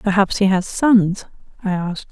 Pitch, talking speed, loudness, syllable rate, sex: 195 Hz, 170 wpm, -18 LUFS, 4.9 syllables/s, female